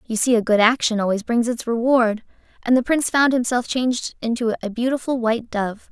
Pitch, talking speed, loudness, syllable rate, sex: 235 Hz, 205 wpm, -20 LUFS, 5.7 syllables/s, female